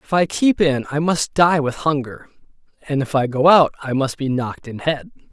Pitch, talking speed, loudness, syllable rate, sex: 145 Hz, 225 wpm, -18 LUFS, 5.1 syllables/s, male